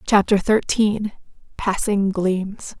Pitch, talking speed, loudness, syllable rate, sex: 200 Hz, 65 wpm, -20 LUFS, 3.1 syllables/s, female